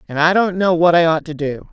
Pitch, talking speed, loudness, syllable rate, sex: 165 Hz, 315 wpm, -15 LUFS, 5.8 syllables/s, female